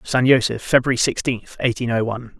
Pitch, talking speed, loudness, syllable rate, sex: 125 Hz, 175 wpm, -19 LUFS, 5.8 syllables/s, male